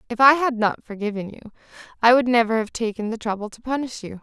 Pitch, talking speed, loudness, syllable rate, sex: 230 Hz, 225 wpm, -21 LUFS, 6.2 syllables/s, female